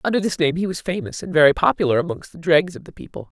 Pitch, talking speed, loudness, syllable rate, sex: 170 Hz, 265 wpm, -19 LUFS, 6.8 syllables/s, female